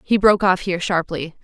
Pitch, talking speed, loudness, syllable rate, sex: 185 Hz, 210 wpm, -18 LUFS, 6.3 syllables/s, female